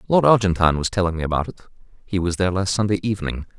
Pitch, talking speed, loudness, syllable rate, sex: 95 Hz, 215 wpm, -20 LUFS, 7.8 syllables/s, male